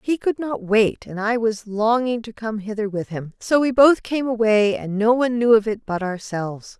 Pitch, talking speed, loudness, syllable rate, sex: 220 Hz, 230 wpm, -20 LUFS, 4.8 syllables/s, female